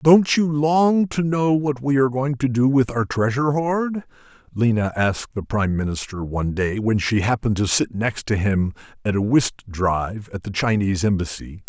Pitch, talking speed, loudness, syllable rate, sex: 120 Hz, 195 wpm, -21 LUFS, 5.0 syllables/s, male